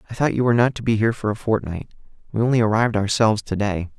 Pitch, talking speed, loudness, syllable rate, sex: 110 Hz, 255 wpm, -20 LUFS, 7.7 syllables/s, male